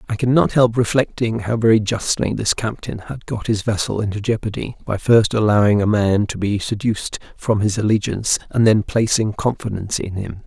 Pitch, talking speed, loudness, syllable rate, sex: 110 Hz, 190 wpm, -19 LUFS, 5.4 syllables/s, male